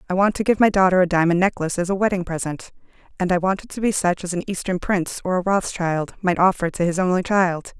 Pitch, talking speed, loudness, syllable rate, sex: 180 Hz, 255 wpm, -20 LUFS, 6.3 syllables/s, female